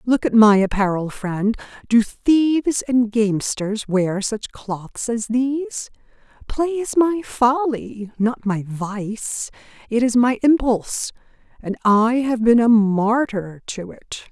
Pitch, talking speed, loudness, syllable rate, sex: 230 Hz, 140 wpm, -19 LUFS, 3.6 syllables/s, female